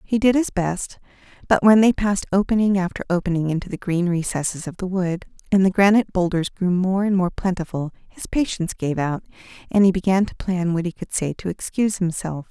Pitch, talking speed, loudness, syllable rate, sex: 185 Hz, 205 wpm, -21 LUFS, 5.8 syllables/s, female